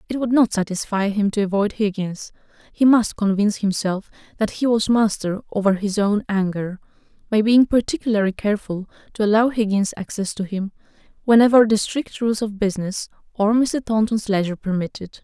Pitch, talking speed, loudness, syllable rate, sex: 210 Hz, 160 wpm, -20 LUFS, 5.4 syllables/s, female